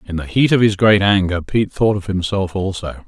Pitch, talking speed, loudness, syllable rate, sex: 100 Hz, 235 wpm, -16 LUFS, 5.5 syllables/s, male